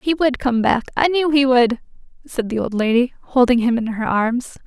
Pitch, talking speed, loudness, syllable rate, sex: 250 Hz, 205 wpm, -18 LUFS, 4.9 syllables/s, female